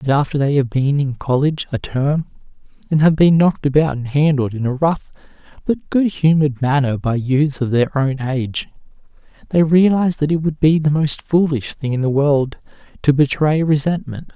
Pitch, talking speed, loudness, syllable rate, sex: 145 Hz, 190 wpm, -17 LUFS, 5.1 syllables/s, male